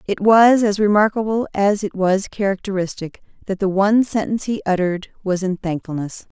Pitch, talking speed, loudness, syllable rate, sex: 200 Hz, 160 wpm, -18 LUFS, 5.5 syllables/s, female